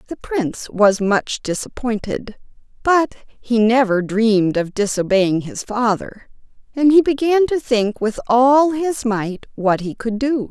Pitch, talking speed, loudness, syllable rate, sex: 235 Hz, 150 wpm, -18 LUFS, 3.9 syllables/s, female